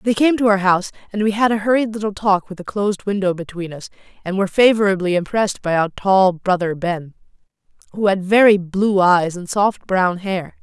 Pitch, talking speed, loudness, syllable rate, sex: 195 Hz, 205 wpm, -18 LUFS, 5.5 syllables/s, female